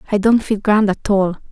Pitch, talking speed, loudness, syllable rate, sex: 205 Hz, 235 wpm, -16 LUFS, 5.2 syllables/s, female